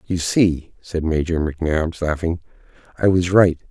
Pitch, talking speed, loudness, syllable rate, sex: 85 Hz, 145 wpm, -20 LUFS, 4.4 syllables/s, male